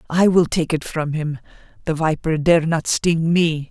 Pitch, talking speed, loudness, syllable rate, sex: 160 Hz, 195 wpm, -19 LUFS, 4.3 syllables/s, female